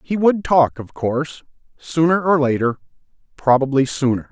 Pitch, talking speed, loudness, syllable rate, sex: 145 Hz, 140 wpm, -18 LUFS, 4.8 syllables/s, male